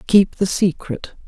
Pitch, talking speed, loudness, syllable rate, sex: 180 Hz, 140 wpm, -19 LUFS, 3.8 syllables/s, female